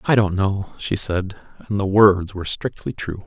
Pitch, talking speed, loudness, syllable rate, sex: 95 Hz, 200 wpm, -20 LUFS, 4.8 syllables/s, male